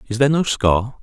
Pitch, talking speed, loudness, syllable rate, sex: 120 Hz, 235 wpm, -17 LUFS, 5.9 syllables/s, male